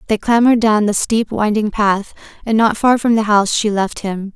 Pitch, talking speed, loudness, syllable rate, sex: 215 Hz, 220 wpm, -15 LUFS, 5.2 syllables/s, female